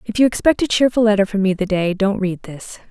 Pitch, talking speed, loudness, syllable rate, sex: 205 Hz, 270 wpm, -17 LUFS, 5.9 syllables/s, female